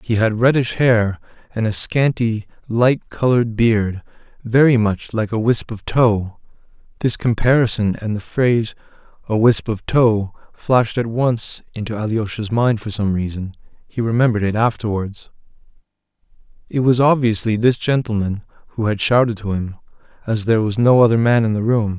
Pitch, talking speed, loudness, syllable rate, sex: 110 Hz, 160 wpm, -18 LUFS, 3.6 syllables/s, male